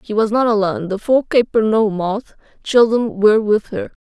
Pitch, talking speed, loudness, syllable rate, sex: 220 Hz, 165 wpm, -16 LUFS, 5.3 syllables/s, female